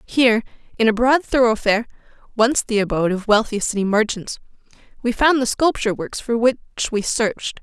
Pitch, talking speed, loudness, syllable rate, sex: 225 Hz, 165 wpm, -19 LUFS, 5.9 syllables/s, female